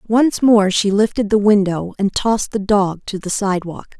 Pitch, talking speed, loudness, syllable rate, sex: 205 Hz, 195 wpm, -16 LUFS, 4.8 syllables/s, female